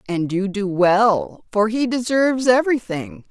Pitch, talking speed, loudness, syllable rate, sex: 220 Hz, 145 wpm, -19 LUFS, 4.3 syllables/s, female